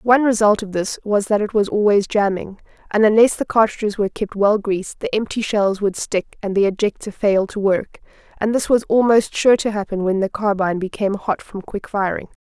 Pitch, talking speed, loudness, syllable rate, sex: 205 Hz, 210 wpm, -19 LUFS, 5.5 syllables/s, female